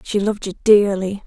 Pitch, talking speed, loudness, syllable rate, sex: 200 Hz, 190 wpm, -17 LUFS, 5.1 syllables/s, female